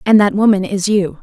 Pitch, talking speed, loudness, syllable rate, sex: 200 Hz, 245 wpm, -14 LUFS, 5.5 syllables/s, female